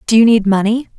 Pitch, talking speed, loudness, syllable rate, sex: 220 Hz, 245 wpm, -12 LUFS, 6.4 syllables/s, female